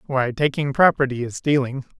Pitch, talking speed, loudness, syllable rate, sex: 135 Hz, 150 wpm, -20 LUFS, 5.2 syllables/s, male